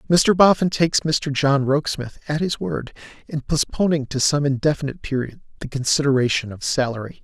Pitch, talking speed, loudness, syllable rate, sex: 145 Hz, 160 wpm, -20 LUFS, 5.6 syllables/s, male